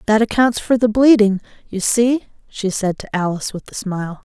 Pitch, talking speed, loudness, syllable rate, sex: 215 Hz, 195 wpm, -17 LUFS, 5.2 syllables/s, female